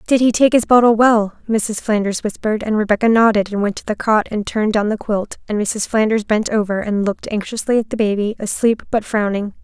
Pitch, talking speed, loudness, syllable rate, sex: 215 Hz, 225 wpm, -17 LUFS, 5.7 syllables/s, female